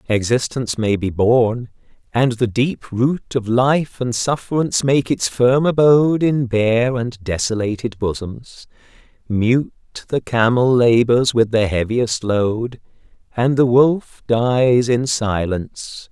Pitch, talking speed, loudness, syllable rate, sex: 120 Hz, 130 wpm, -17 LUFS, 3.8 syllables/s, male